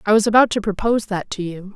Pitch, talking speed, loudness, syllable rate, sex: 205 Hz, 275 wpm, -19 LUFS, 6.8 syllables/s, female